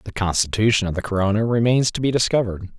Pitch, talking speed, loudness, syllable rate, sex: 110 Hz, 195 wpm, -20 LUFS, 7.0 syllables/s, male